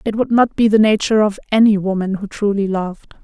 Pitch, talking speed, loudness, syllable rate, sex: 210 Hz, 225 wpm, -16 LUFS, 6.1 syllables/s, female